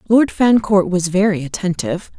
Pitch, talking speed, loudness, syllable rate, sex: 190 Hz, 135 wpm, -16 LUFS, 5.1 syllables/s, female